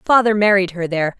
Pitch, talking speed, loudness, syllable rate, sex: 195 Hz, 200 wpm, -16 LUFS, 6.5 syllables/s, female